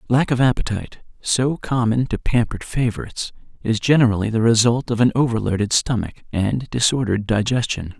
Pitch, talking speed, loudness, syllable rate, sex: 115 Hz, 145 wpm, -20 LUFS, 5.7 syllables/s, male